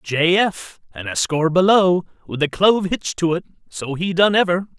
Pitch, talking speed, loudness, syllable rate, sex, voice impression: 175 Hz, 200 wpm, -18 LUFS, 4.9 syllables/s, male, masculine, slightly old, tensed, powerful, clear, slightly halting, raspy, mature, wild, strict, intense, sharp